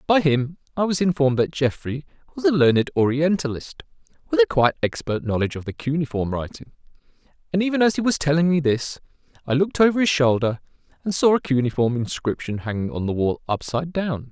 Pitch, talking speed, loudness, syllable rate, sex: 145 Hz, 185 wpm, -22 LUFS, 6.2 syllables/s, male